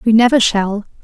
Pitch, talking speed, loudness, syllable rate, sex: 220 Hz, 175 wpm, -14 LUFS, 5.1 syllables/s, female